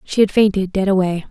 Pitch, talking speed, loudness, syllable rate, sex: 195 Hz, 230 wpm, -16 LUFS, 6.0 syllables/s, female